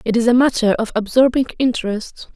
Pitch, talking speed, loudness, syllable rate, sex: 235 Hz, 180 wpm, -17 LUFS, 5.9 syllables/s, female